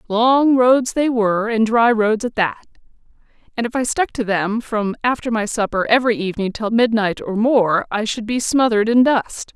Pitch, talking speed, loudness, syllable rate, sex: 225 Hz, 195 wpm, -17 LUFS, 4.9 syllables/s, female